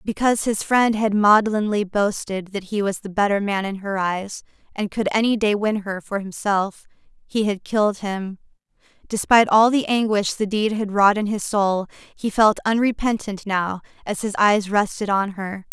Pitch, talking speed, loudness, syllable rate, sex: 205 Hz, 185 wpm, -21 LUFS, 4.7 syllables/s, female